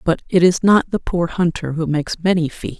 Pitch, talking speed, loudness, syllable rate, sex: 170 Hz, 235 wpm, -18 LUFS, 5.3 syllables/s, female